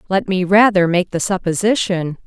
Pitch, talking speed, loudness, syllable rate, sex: 185 Hz, 160 wpm, -16 LUFS, 5.0 syllables/s, female